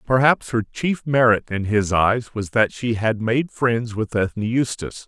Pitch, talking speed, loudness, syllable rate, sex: 115 Hz, 190 wpm, -20 LUFS, 4.4 syllables/s, male